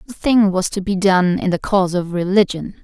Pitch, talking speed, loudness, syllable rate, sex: 190 Hz, 235 wpm, -17 LUFS, 5.4 syllables/s, female